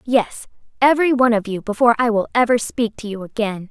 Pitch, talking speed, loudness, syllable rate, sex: 230 Hz, 210 wpm, -18 LUFS, 6.3 syllables/s, female